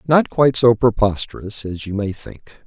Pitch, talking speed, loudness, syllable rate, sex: 110 Hz, 180 wpm, -18 LUFS, 4.8 syllables/s, male